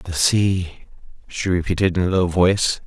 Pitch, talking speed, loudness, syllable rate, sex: 90 Hz, 170 wpm, -19 LUFS, 4.6 syllables/s, male